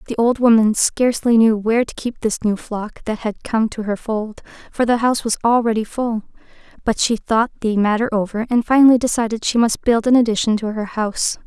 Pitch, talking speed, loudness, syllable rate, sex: 225 Hz, 210 wpm, -18 LUFS, 5.6 syllables/s, female